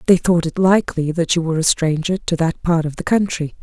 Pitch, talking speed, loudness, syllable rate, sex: 170 Hz, 250 wpm, -18 LUFS, 5.9 syllables/s, female